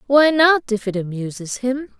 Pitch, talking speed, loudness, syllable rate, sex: 245 Hz, 180 wpm, -18 LUFS, 4.4 syllables/s, female